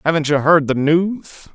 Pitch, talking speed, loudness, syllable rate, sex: 155 Hz, 195 wpm, -16 LUFS, 4.3 syllables/s, male